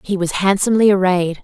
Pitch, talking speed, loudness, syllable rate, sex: 190 Hz, 170 wpm, -15 LUFS, 6.0 syllables/s, female